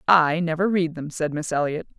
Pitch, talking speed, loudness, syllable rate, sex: 160 Hz, 210 wpm, -23 LUFS, 5.2 syllables/s, female